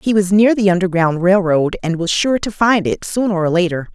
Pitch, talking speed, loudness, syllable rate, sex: 190 Hz, 245 wpm, -15 LUFS, 5.3 syllables/s, female